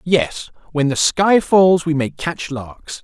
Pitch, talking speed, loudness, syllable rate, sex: 150 Hz, 180 wpm, -17 LUFS, 3.3 syllables/s, male